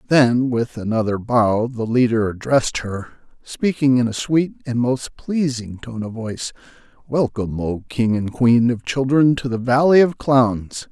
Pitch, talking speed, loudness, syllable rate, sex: 120 Hz, 165 wpm, -19 LUFS, 4.3 syllables/s, male